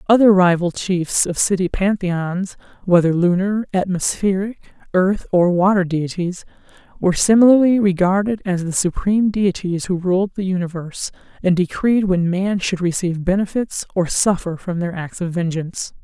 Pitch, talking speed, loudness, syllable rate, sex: 185 Hz, 140 wpm, -18 LUFS, 4.9 syllables/s, female